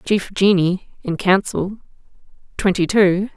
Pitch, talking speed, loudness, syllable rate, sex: 190 Hz, 105 wpm, -18 LUFS, 3.8 syllables/s, female